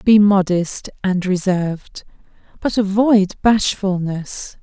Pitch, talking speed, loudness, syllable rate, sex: 195 Hz, 90 wpm, -17 LUFS, 3.4 syllables/s, female